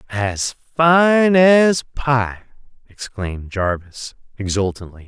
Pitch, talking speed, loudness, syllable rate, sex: 125 Hz, 85 wpm, -17 LUFS, 3.2 syllables/s, male